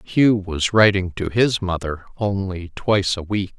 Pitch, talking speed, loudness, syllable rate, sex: 95 Hz, 165 wpm, -20 LUFS, 4.3 syllables/s, male